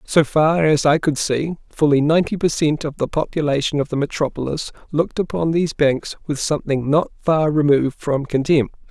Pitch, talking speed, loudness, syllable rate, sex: 150 Hz, 180 wpm, -19 LUFS, 5.4 syllables/s, male